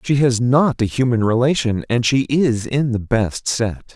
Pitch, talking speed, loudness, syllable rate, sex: 125 Hz, 195 wpm, -18 LUFS, 4.2 syllables/s, male